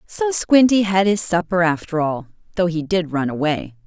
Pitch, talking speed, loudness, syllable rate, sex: 175 Hz, 185 wpm, -18 LUFS, 4.8 syllables/s, female